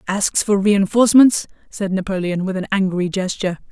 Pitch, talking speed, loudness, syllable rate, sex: 195 Hz, 145 wpm, -17 LUFS, 5.3 syllables/s, female